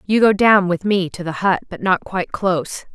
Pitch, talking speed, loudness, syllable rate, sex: 185 Hz, 245 wpm, -18 LUFS, 5.2 syllables/s, female